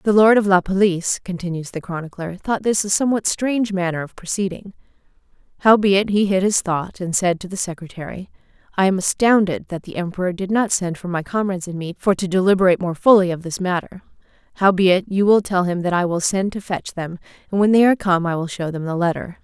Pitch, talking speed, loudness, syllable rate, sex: 185 Hz, 220 wpm, -19 LUFS, 6.0 syllables/s, female